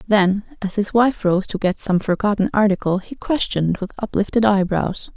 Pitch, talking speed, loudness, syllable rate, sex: 200 Hz, 175 wpm, -19 LUFS, 5.0 syllables/s, female